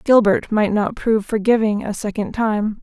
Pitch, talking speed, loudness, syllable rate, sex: 215 Hz, 170 wpm, -18 LUFS, 4.8 syllables/s, female